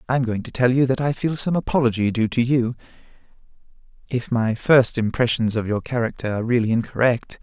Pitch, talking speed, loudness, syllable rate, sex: 120 Hz, 195 wpm, -21 LUFS, 5.9 syllables/s, male